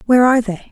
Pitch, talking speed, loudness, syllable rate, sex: 235 Hz, 255 wpm, -14 LUFS, 8.8 syllables/s, female